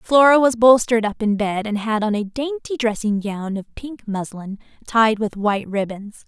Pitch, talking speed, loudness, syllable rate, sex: 220 Hz, 190 wpm, -19 LUFS, 4.7 syllables/s, female